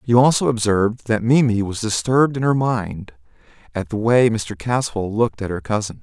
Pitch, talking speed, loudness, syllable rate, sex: 115 Hz, 190 wpm, -19 LUFS, 5.2 syllables/s, male